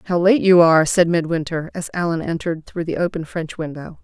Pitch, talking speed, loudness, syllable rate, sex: 170 Hz, 210 wpm, -19 LUFS, 5.8 syllables/s, female